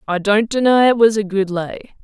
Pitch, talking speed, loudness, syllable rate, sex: 210 Hz, 235 wpm, -15 LUFS, 5.1 syllables/s, female